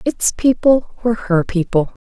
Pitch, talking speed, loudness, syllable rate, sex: 215 Hz, 145 wpm, -16 LUFS, 4.4 syllables/s, female